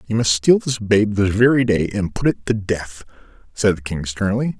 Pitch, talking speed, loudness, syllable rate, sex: 105 Hz, 220 wpm, -18 LUFS, 4.8 syllables/s, male